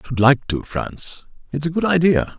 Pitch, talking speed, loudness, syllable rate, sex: 145 Hz, 225 wpm, -19 LUFS, 4.9 syllables/s, male